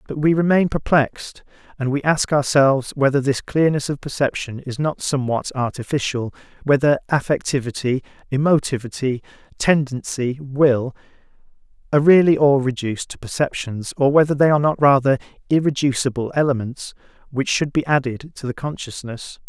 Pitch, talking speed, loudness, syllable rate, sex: 135 Hz, 130 wpm, -19 LUFS, 5.5 syllables/s, male